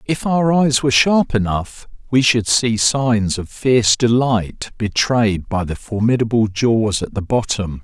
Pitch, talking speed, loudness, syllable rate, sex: 115 Hz, 160 wpm, -17 LUFS, 4.0 syllables/s, male